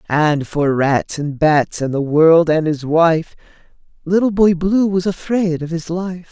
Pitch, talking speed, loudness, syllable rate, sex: 165 Hz, 180 wpm, -16 LUFS, 3.9 syllables/s, male